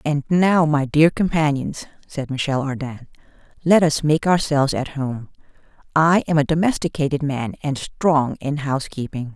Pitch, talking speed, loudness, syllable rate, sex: 150 Hz, 145 wpm, -20 LUFS, 4.7 syllables/s, female